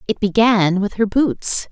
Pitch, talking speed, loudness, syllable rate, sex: 210 Hz, 175 wpm, -17 LUFS, 3.9 syllables/s, female